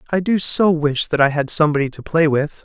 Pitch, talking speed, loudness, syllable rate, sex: 155 Hz, 250 wpm, -17 LUFS, 5.8 syllables/s, male